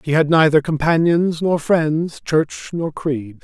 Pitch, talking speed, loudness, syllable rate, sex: 155 Hz, 155 wpm, -18 LUFS, 3.7 syllables/s, male